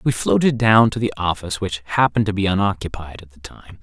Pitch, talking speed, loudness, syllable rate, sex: 100 Hz, 220 wpm, -19 LUFS, 6.0 syllables/s, male